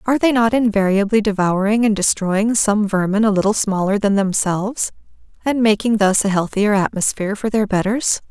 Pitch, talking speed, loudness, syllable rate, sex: 210 Hz, 165 wpm, -17 LUFS, 5.4 syllables/s, female